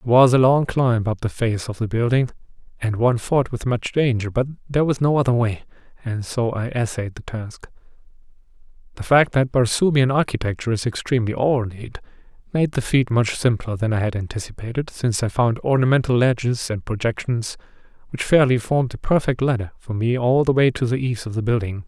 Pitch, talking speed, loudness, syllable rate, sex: 120 Hz, 190 wpm, -20 LUFS, 5.7 syllables/s, male